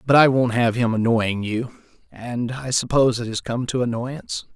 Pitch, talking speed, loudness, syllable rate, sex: 120 Hz, 170 wpm, -21 LUFS, 4.9 syllables/s, male